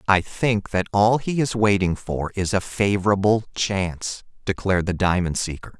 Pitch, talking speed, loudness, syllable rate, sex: 100 Hz, 165 wpm, -22 LUFS, 4.8 syllables/s, male